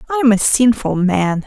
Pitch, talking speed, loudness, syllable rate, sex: 225 Hz, 205 wpm, -14 LUFS, 4.9 syllables/s, female